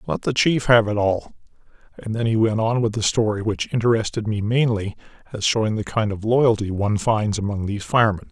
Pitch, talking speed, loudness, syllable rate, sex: 110 Hz, 210 wpm, -21 LUFS, 5.7 syllables/s, male